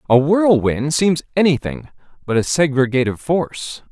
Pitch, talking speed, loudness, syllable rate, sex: 145 Hz, 125 wpm, -17 LUFS, 5.0 syllables/s, male